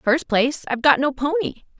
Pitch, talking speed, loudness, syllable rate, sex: 280 Hz, 200 wpm, -20 LUFS, 5.8 syllables/s, female